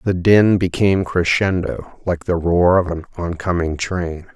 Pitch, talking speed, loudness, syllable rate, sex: 90 Hz, 150 wpm, -18 LUFS, 4.4 syllables/s, male